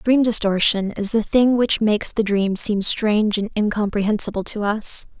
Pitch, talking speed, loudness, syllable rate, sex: 210 Hz, 175 wpm, -19 LUFS, 4.8 syllables/s, female